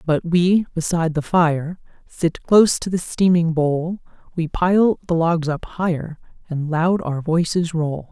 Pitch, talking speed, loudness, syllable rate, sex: 165 Hz, 165 wpm, -19 LUFS, 4.0 syllables/s, female